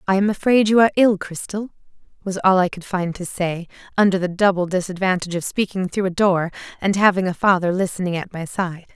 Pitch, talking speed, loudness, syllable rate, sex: 185 Hz, 210 wpm, -20 LUFS, 5.9 syllables/s, female